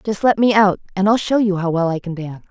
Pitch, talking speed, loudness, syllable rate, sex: 195 Hz, 310 wpm, -17 LUFS, 6.3 syllables/s, female